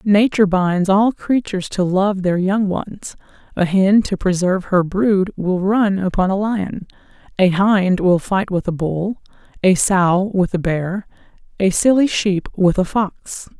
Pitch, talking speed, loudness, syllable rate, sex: 190 Hz, 170 wpm, -17 LUFS, 4.0 syllables/s, female